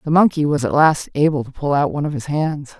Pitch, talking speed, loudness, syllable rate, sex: 145 Hz, 280 wpm, -18 LUFS, 6.1 syllables/s, female